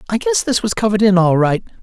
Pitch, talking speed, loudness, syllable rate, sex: 185 Hz, 265 wpm, -15 LUFS, 6.8 syllables/s, male